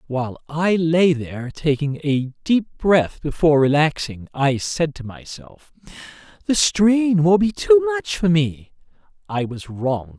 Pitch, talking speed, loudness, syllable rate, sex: 160 Hz, 145 wpm, -19 LUFS, 4.3 syllables/s, male